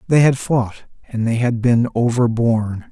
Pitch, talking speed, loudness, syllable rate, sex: 120 Hz, 165 wpm, -17 LUFS, 4.8 syllables/s, male